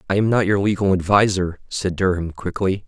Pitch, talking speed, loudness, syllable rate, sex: 95 Hz, 190 wpm, -20 LUFS, 5.4 syllables/s, male